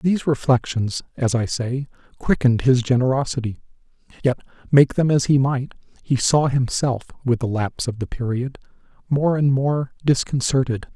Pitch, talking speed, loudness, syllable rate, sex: 130 Hz, 150 wpm, -21 LUFS, 5.0 syllables/s, male